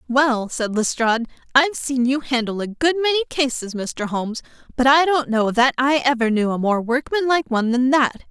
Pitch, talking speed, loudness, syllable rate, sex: 255 Hz, 195 wpm, -19 LUFS, 5.6 syllables/s, female